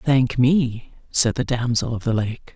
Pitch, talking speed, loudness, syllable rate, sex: 125 Hz, 190 wpm, -21 LUFS, 4.4 syllables/s, female